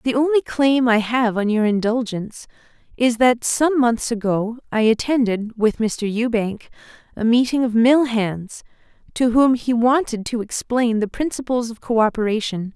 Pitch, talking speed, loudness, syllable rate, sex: 235 Hz, 155 wpm, -19 LUFS, 4.5 syllables/s, female